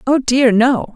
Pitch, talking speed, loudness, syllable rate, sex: 250 Hz, 190 wpm, -13 LUFS, 3.7 syllables/s, female